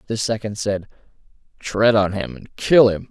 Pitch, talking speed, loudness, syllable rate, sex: 105 Hz, 175 wpm, -19 LUFS, 4.6 syllables/s, male